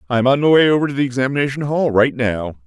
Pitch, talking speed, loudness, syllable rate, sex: 130 Hz, 250 wpm, -16 LUFS, 6.6 syllables/s, male